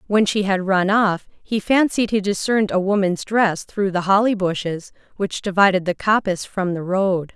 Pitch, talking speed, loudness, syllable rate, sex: 195 Hz, 190 wpm, -19 LUFS, 4.8 syllables/s, female